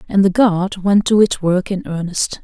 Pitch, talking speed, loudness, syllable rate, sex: 190 Hz, 220 wpm, -16 LUFS, 4.5 syllables/s, female